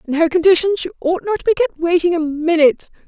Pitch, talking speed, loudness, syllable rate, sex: 345 Hz, 235 wpm, -16 LUFS, 6.5 syllables/s, female